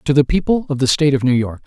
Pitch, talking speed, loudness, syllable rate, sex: 140 Hz, 325 wpm, -16 LUFS, 7.3 syllables/s, male